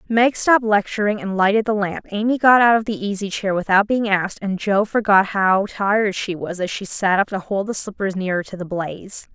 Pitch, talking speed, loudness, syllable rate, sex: 200 Hz, 230 wpm, -19 LUFS, 5.4 syllables/s, female